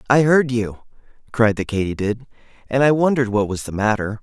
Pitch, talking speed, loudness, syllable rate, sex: 115 Hz, 185 wpm, -19 LUFS, 5.8 syllables/s, male